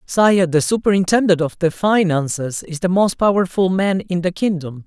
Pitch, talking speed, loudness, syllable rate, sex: 180 Hz, 175 wpm, -17 LUFS, 4.9 syllables/s, male